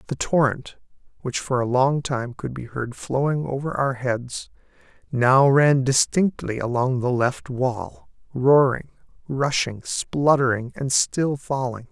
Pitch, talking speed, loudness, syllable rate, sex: 130 Hz, 135 wpm, -22 LUFS, 3.8 syllables/s, male